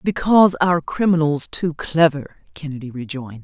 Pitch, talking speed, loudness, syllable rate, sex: 150 Hz, 120 wpm, -18 LUFS, 5.1 syllables/s, female